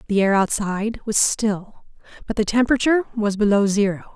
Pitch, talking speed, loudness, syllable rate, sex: 210 Hz, 160 wpm, -20 LUFS, 5.6 syllables/s, female